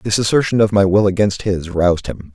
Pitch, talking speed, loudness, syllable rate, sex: 100 Hz, 230 wpm, -16 LUFS, 5.6 syllables/s, male